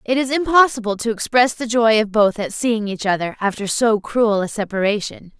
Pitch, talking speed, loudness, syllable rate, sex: 225 Hz, 200 wpm, -18 LUFS, 5.2 syllables/s, female